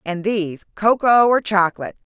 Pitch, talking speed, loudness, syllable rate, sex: 205 Hz, 110 wpm, -17 LUFS, 5.5 syllables/s, female